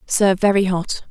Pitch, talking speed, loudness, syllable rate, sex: 190 Hz, 165 wpm, -18 LUFS, 5.5 syllables/s, female